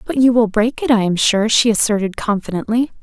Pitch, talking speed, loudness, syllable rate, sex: 225 Hz, 220 wpm, -16 LUFS, 5.6 syllables/s, female